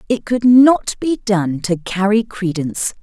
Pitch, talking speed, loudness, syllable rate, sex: 210 Hz, 160 wpm, -16 LUFS, 4.0 syllables/s, female